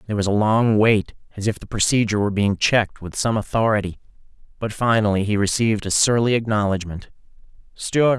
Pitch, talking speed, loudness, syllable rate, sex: 105 Hz, 170 wpm, -20 LUFS, 6.3 syllables/s, male